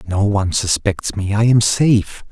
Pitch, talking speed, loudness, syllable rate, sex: 105 Hz, 180 wpm, -16 LUFS, 4.7 syllables/s, male